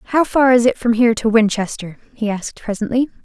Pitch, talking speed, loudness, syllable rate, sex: 230 Hz, 205 wpm, -17 LUFS, 6.4 syllables/s, female